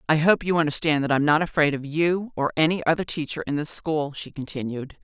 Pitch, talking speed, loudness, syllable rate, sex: 155 Hz, 240 wpm, -23 LUFS, 5.9 syllables/s, female